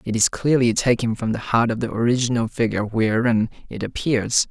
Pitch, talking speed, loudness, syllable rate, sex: 115 Hz, 185 wpm, -21 LUFS, 5.5 syllables/s, male